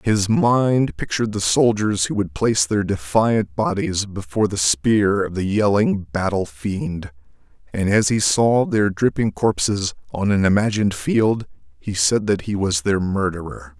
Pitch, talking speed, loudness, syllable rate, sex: 100 Hz, 160 wpm, -19 LUFS, 4.3 syllables/s, male